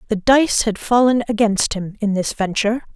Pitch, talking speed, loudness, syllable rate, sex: 220 Hz, 185 wpm, -18 LUFS, 5.1 syllables/s, female